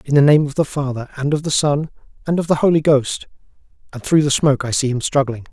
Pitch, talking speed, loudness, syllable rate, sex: 140 Hz, 250 wpm, -17 LUFS, 6.1 syllables/s, male